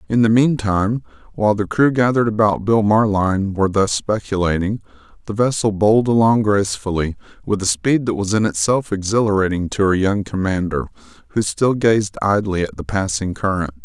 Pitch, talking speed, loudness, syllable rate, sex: 100 Hz, 165 wpm, -18 LUFS, 5.6 syllables/s, male